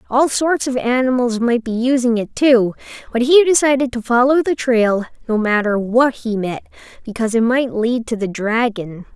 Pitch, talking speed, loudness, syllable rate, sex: 240 Hz, 185 wpm, -16 LUFS, 4.8 syllables/s, female